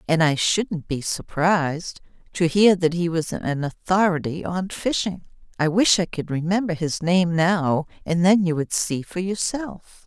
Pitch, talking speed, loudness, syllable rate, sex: 175 Hz, 175 wpm, -22 LUFS, 4.2 syllables/s, female